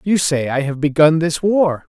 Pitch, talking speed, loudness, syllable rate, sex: 160 Hz, 215 wpm, -16 LUFS, 4.5 syllables/s, male